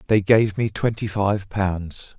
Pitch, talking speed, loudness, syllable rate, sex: 100 Hz, 165 wpm, -21 LUFS, 3.6 syllables/s, male